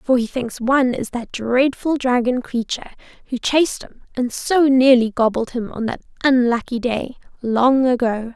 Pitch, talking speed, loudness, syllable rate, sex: 250 Hz, 165 wpm, -19 LUFS, 4.7 syllables/s, female